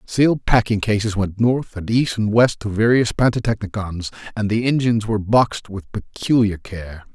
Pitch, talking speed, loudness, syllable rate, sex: 110 Hz, 170 wpm, -19 LUFS, 4.9 syllables/s, male